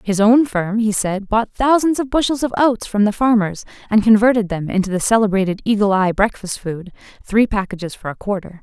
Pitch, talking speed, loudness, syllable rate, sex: 210 Hz, 200 wpm, -17 LUFS, 5.4 syllables/s, female